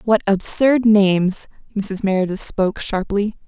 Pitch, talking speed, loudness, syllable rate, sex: 200 Hz, 120 wpm, -18 LUFS, 4.4 syllables/s, female